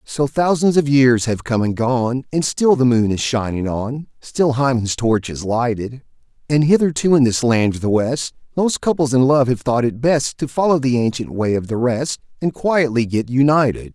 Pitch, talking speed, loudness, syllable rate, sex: 130 Hz, 205 wpm, -17 LUFS, 4.7 syllables/s, male